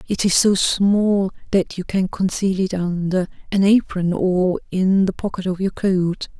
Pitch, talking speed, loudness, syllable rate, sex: 190 Hz, 180 wpm, -19 LUFS, 4.1 syllables/s, female